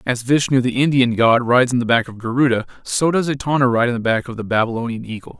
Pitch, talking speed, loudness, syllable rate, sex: 125 Hz, 245 wpm, -18 LUFS, 6.5 syllables/s, male